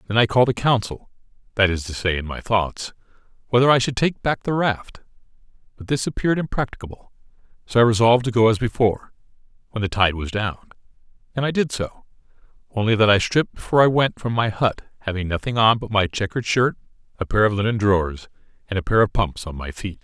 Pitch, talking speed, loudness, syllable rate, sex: 110 Hz, 200 wpm, -21 LUFS, 6.2 syllables/s, male